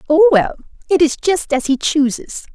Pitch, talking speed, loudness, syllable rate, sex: 295 Hz, 190 wpm, -15 LUFS, 4.6 syllables/s, female